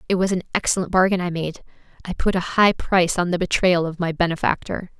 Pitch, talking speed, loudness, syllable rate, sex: 180 Hz, 205 wpm, -21 LUFS, 6.3 syllables/s, female